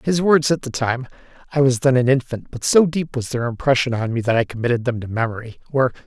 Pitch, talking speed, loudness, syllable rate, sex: 130 Hz, 245 wpm, -19 LUFS, 1.9 syllables/s, male